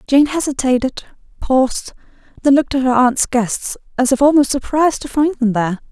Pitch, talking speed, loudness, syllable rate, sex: 265 Hz, 160 wpm, -16 LUFS, 5.4 syllables/s, female